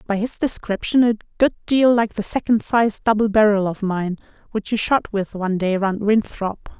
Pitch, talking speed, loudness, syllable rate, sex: 210 Hz, 195 wpm, -20 LUFS, 5.0 syllables/s, female